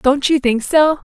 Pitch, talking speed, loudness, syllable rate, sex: 280 Hz, 215 wpm, -15 LUFS, 4.1 syllables/s, female